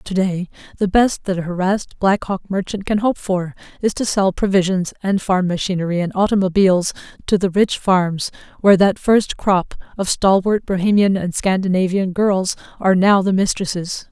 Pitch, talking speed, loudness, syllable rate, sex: 190 Hz, 170 wpm, -18 LUFS, 5.0 syllables/s, female